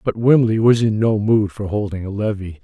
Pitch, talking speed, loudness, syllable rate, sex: 105 Hz, 230 wpm, -17 LUFS, 5.1 syllables/s, male